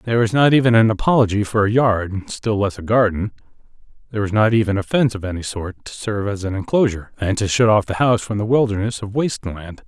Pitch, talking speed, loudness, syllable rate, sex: 105 Hz, 230 wpm, -18 LUFS, 6.5 syllables/s, male